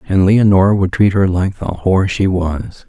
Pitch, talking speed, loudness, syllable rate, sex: 95 Hz, 210 wpm, -14 LUFS, 4.8 syllables/s, male